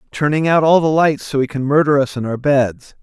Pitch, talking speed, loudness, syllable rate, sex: 145 Hz, 260 wpm, -16 LUFS, 5.4 syllables/s, male